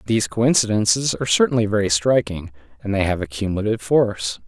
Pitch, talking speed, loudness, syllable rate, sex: 105 Hz, 160 wpm, -19 LUFS, 6.6 syllables/s, male